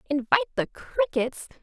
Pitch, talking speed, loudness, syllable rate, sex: 315 Hz, 110 wpm, -26 LUFS, 5.4 syllables/s, female